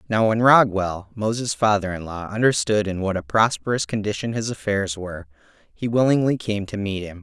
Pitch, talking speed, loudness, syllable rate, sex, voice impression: 105 Hz, 185 wpm, -21 LUFS, 5.3 syllables/s, male, masculine, adult-like, slightly bright, clear, slightly halting, slightly raspy, slightly sincere, slightly mature, friendly, unique, slightly lively, modest